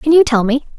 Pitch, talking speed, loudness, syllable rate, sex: 270 Hz, 305 wpm, -13 LUFS, 6.1 syllables/s, female